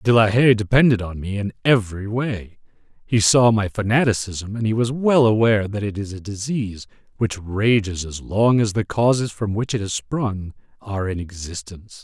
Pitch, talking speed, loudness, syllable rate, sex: 105 Hz, 190 wpm, -20 LUFS, 5.1 syllables/s, male